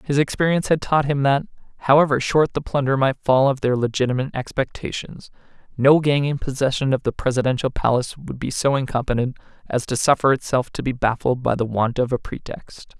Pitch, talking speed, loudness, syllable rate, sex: 135 Hz, 190 wpm, -20 LUFS, 5.8 syllables/s, male